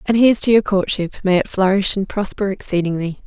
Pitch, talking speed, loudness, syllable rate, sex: 195 Hz, 185 wpm, -17 LUFS, 6.0 syllables/s, female